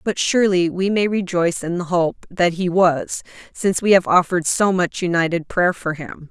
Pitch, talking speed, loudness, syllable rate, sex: 180 Hz, 200 wpm, -19 LUFS, 5.1 syllables/s, female